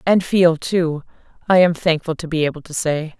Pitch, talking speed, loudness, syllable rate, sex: 165 Hz, 205 wpm, -18 LUFS, 5.0 syllables/s, female